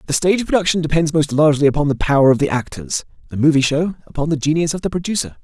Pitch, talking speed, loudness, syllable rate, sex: 150 Hz, 230 wpm, -17 LUFS, 7.2 syllables/s, male